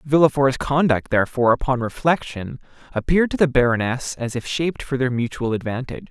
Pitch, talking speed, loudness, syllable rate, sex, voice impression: 135 Hz, 155 wpm, -20 LUFS, 6.0 syllables/s, male, very masculine, very adult-like, very middle-aged, very thick, tensed, very powerful, bright, slightly hard, slightly muffled, fluent, slightly raspy, cool, intellectual, slightly refreshing, very sincere, very calm, mature, friendly, reassuring, slightly unique, slightly elegant, slightly wild, slightly sweet, lively, kind, slightly intense